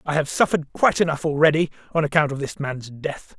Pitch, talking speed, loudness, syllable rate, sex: 150 Hz, 215 wpm, -22 LUFS, 6.3 syllables/s, male